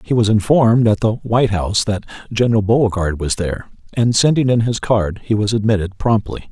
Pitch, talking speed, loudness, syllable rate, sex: 110 Hz, 195 wpm, -16 LUFS, 5.8 syllables/s, male